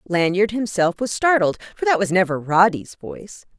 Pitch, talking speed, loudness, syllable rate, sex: 195 Hz, 165 wpm, -19 LUFS, 5.1 syllables/s, female